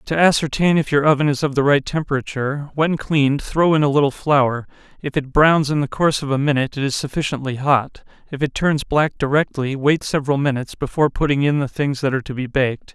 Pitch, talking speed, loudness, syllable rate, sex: 140 Hz, 225 wpm, -19 LUFS, 6.1 syllables/s, male